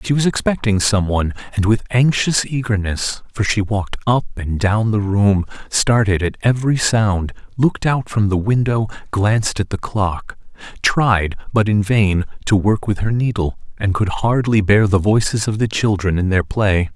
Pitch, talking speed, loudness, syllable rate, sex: 105 Hz, 180 wpm, -17 LUFS, 4.7 syllables/s, male